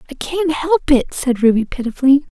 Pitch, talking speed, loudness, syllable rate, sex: 280 Hz, 180 wpm, -16 LUFS, 5.5 syllables/s, female